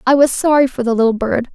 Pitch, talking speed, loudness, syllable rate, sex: 250 Hz, 270 wpm, -14 LUFS, 6.3 syllables/s, female